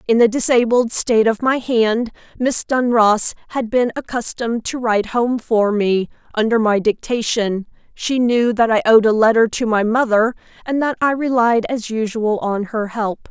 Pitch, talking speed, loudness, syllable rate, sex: 230 Hz, 175 wpm, -17 LUFS, 4.6 syllables/s, female